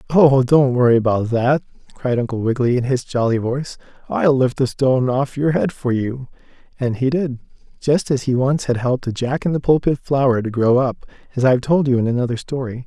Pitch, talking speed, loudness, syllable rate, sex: 130 Hz, 220 wpm, -18 LUFS, 5.6 syllables/s, male